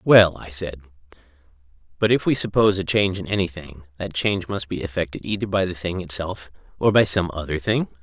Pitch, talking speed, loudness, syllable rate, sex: 90 Hz, 195 wpm, -22 LUFS, 5.9 syllables/s, male